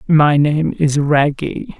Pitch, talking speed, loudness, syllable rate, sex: 150 Hz, 135 wpm, -15 LUFS, 3.2 syllables/s, female